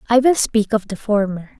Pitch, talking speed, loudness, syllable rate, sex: 215 Hz, 225 wpm, -18 LUFS, 5.3 syllables/s, female